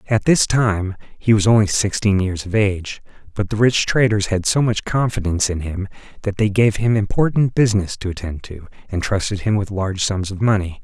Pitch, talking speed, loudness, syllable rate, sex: 105 Hz, 205 wpm, -19 LUFS, 5.4 syllables/s, male